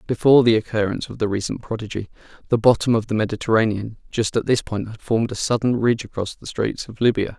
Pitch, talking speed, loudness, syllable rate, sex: 110 Hz, 210 wpm, -21 LUFS, 6.6 syllables/s, male